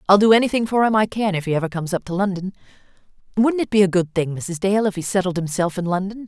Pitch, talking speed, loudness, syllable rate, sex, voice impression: 195 Hz, 270 wpm, -20 LUFS, 6.9 syllables/s, female, very feminine, very adult-like, thin, slightly tensed, slightly weak, slightly bright, soft, clear, slightly fluent, cool, very intellectual, refreshing, sincere, calm, very friendly, reassuring, unique, very elegant, slightly wild, very sweet, lively, very kind, modest